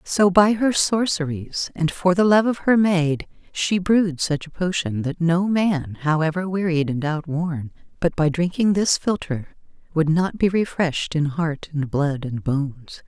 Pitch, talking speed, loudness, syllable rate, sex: 170 Hz, 175 wpm, -21 LUFS, 4.3 syllables/s, female